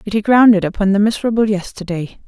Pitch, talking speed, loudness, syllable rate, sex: 205 Hz, 210 wpm, -15 LUFS, 6.4 syllables/s, female